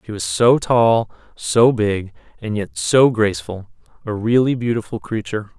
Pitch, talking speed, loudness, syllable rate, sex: 110 Hz, 150 wpm, -18 LUFS, 4.6 syllables/s, male